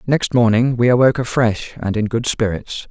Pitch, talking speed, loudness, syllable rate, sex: 120 Hz, 185 wpm, -17 LUFS, 4.8 syllables/s, male